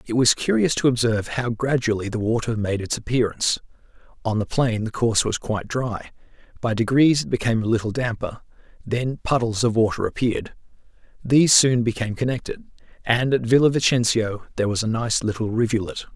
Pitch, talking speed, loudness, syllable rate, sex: 115 Hz, 170 wpm, -21 LUFS, 5.9 syllables/s, male